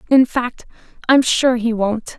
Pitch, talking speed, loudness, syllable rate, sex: 240 Hz, 165 wpm, -16 LUFS, 3.8 syllables/s, female